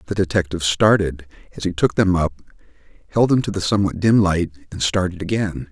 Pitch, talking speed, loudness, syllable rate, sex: 90 Hz, 190 wpm, -19 LUFS, 6.2 syllables/s, male